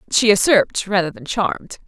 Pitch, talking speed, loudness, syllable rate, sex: 195 Hz, 160 wpm, -17 LUFS, 5.9 syllables/s, female